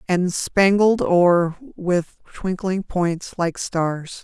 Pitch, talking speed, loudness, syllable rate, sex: 180 Hz, 115 wpm, -20 LUFS, 2.8 syllables/s, female